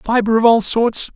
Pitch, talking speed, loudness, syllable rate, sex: 225 Hz, 210 wpm, -14 LUFS, 4.6 syllables/s, male